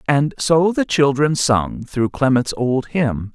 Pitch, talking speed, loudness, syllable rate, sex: 135 Hz, 160 wpm, -18 LUFS, 3.5 syllables/s, male